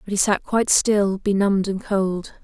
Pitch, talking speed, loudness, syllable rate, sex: 200 Hz, 195 wpm, -20 LUFS, 4.8 syllables/s, female